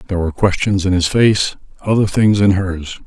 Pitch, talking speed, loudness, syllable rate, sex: 95 Hz, 175 wpm, -15 LUFS, 5.5 syllables/s, male